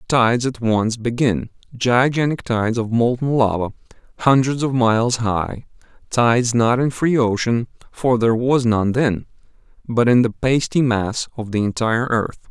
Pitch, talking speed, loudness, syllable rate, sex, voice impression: 120 Hz, 150 wpm, -18 LUFS, 4.6 syllables/s, male, masculine, adult-like, slightly thick, slightly fluent, slightly refreshing, sincere